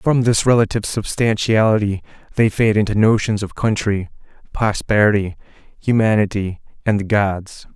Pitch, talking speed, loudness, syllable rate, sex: 105 Hz, 115 wpm, -17 LUFS, 4.9 syllables/s, male